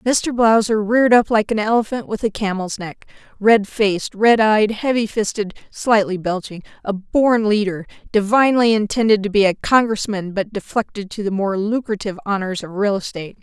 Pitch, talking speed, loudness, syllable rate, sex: 210 Hz, 155 wpm, -18 LUFS, 5.2 syllables/s, female